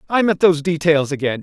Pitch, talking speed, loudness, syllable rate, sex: 165 Hz, 210 wpm, -17 LUFS, 6.4 syllables/s, male